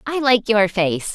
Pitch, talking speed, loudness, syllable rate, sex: 215 Hz, 210 wpm, -17 LUFS, 4.0 syllables/s, female